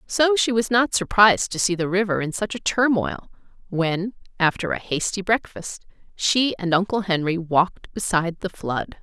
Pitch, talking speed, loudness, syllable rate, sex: 195 Hz, 175 wpm, -21 LUFS, 4.8 syllables/s, female